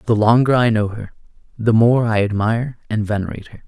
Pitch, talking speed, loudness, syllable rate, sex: 110 Hz, 195 wpm, -17 LUFS, 6.0 syllables/s, male